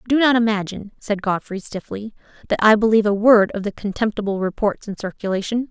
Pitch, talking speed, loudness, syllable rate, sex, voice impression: 210 Hz, 180 wpm, -19 LUFS, 6.1 syllables/s, female, very feminine, young, very thin, very tensed, powerful, very bright, slightly soft, very clear, very fluent, very cute, intellectual, very refreshing, sincere, calm, friendly, very reassuring, very unique, elegant, slightly wild, sweet, very lively, kind, intense, light